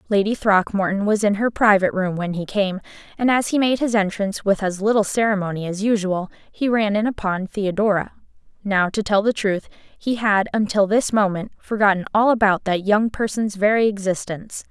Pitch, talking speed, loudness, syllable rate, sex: 205 Hz, 185 wpm, -20 LUFS, 5.3 syllables/s, female